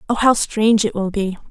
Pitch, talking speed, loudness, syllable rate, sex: 210 Hz, 240 wpm, -17 LUFS, 5.8 syllables/s, female